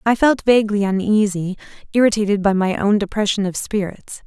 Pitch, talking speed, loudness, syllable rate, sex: 205 Hz, 155 wpm, -18 LUFS, 5.6 syllables/s, female